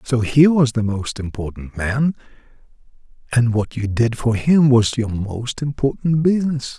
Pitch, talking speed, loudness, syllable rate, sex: 125 Hz, 160 wpm, -18 LUFS, 4.3 syllables/s, male